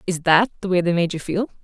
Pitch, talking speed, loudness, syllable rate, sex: 180 Hz, 295 wpm, -20 LUFS, 6.3 syllables/s, female